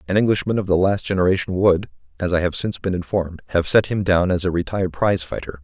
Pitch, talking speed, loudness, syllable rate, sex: 95 Hz, 235 wpm, -20 LUFS, 6.7 syllables/s, male